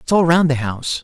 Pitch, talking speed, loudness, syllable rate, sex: 150 Hz, 290 wpm, -16 LUFS, 6.1 syllables/s, male